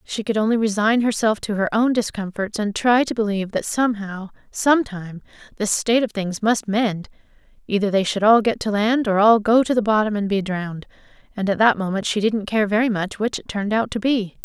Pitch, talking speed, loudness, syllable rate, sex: 215 Hz, 215 wpm, -20 LUFS, 5.7 syllables/s, female